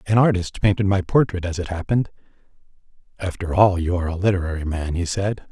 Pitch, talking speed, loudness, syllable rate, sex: 95 Hz, 185 wpm, -21 LUFS, 6.3 syllables/s, male